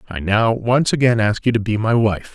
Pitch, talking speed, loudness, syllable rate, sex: 110 Hz, 255 wpm, -17 LUFS, 5.1 syllables/s, male